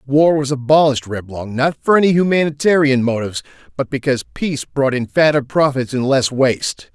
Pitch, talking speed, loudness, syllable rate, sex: 140 Hz, 165 wpm, -16 LUFS, 5.6 syllables/s, male